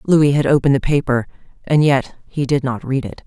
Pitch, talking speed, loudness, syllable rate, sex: 135 Hz, 220 wpm, -17 LUFS, 5.5 syllables/s, female